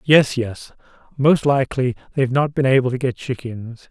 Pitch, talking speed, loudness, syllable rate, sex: 130 Hz, 170 wpm, -19 LUFS, 5.1 syllables/s, male